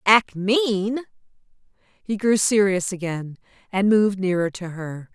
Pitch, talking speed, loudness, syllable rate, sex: 200 Hz, 130 wpm, -22 LUFS, 3.9 syllables/s, female